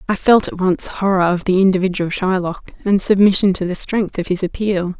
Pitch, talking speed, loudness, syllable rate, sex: 190 Hz, 205 wpm, -16 LUFS, 5.5 syllables/s, female